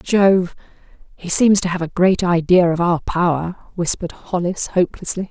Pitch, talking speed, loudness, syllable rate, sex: 180 Hz, 170 wpm, -17 LUFS, 5.4 syllables/s, female